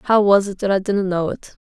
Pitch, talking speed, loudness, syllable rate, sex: 195 Hz, 255 wpm, -18 LUFS, 4.6 syllables/s, female